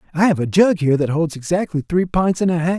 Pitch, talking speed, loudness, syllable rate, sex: 170 Hz, 280 wpm, -18 LUFS, 6.4 syllables/s, male